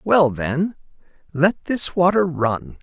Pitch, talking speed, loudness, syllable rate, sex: 160 Hz, 125 wpm, -19 LUFS, 3.3 syllables/s, male